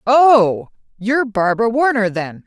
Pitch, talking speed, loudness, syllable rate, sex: 225 Hz, 120 wpm, -15 LUFS, 4.4 syllables/s, female